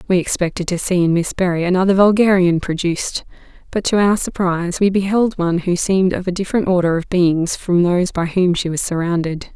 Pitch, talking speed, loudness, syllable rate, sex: 180 Hz, 200 wpm, -17 LUFS, 5.8 syllables/s, female